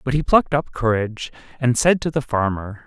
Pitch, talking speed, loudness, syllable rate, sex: 130 Hz, 210 wpm, -20 LUFS, 5.7 syllables/s, male